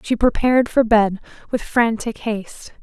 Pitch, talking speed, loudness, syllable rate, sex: 225 Hz, 150 wpm, -19 LUFS, 4.7 syllables/s, female